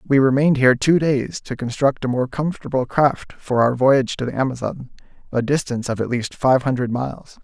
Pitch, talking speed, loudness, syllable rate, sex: 130 Hz, 200 wpm, -19 LUFS, 5.6 syllables/s, male